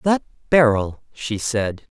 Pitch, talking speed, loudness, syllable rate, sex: 125 Hz, 125 wpm, -20 LUFS, 3.4 syllables/s, male